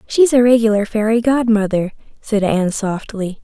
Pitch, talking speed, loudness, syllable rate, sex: 220 Hz, 140 wpm, -16 LUFS, 5.0 syllables/s, female